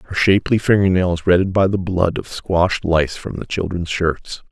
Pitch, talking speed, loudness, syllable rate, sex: 90 Hz, 185 wpm, -18 LUFS, 5.2 syllables/s, male